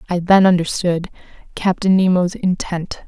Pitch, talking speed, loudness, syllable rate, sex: 180 Hz, 115 wpm, -17 LUFS, 4.5 syllables/s, female